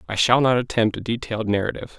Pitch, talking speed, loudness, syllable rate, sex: 115 Hz, 210 wpm, -21 LUFS, 7.1 syllables/s, male